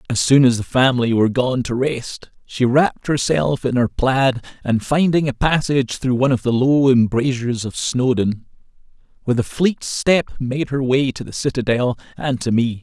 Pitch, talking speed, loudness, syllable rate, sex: 130 Hz, 185 wpm, -18 LUFS, 4.9 syllables/s, male